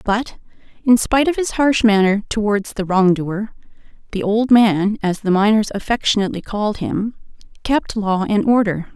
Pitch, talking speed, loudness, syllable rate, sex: 210 Hz, 160 wpm, -17 LUFS, 4.9 syllables/s, female